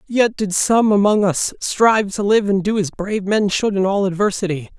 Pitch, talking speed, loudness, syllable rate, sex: 200 Hz, 215 wpm, -17 LUFS, 5.1 syllables/s, male